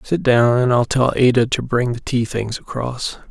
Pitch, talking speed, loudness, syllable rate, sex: 120 Hz, 220 wpm, -18 LUFS, 4.5 syllables/s, male